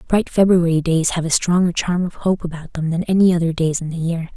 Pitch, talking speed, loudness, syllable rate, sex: 170 Hz, 250 wpm, -18 LUFS, 5.8 syllables/s, female